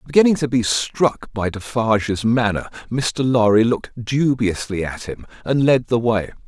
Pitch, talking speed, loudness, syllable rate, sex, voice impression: 115 Hz, 160 wpm, -19 LUFS, 4.6 syllables/s, male, masculine, adult-like, slightly powerful, cool, slightly sincere, slightly intense